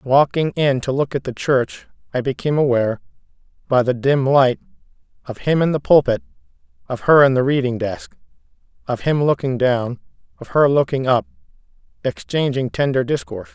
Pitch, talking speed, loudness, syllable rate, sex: 135 Hz, 160 wpm, -18 LUFS, 5.3 syllables/s, male